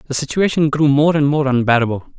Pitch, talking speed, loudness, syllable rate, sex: 140 Hz, 190 wpm, -15 LUFS, 6.3 syllables/s, male